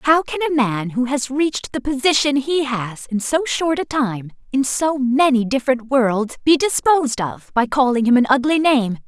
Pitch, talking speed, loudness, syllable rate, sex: 260 Hz, 185 wpm, -18 LUFS, 4.7 syllables/s, female